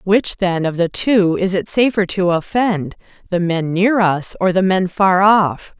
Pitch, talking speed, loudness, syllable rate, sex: 190 Hz, 195 wpm, -16 LUFS, 4.0 syllables/s, female